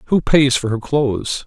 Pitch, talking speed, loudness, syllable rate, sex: 135 Hz, 205 wpm, -17 LUFS, 4.8 syllables/s, male